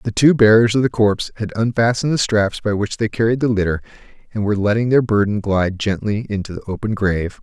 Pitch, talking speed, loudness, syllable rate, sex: 110 Hz, 220 wpm, -18 LUFS, 6.4 syllables/s, male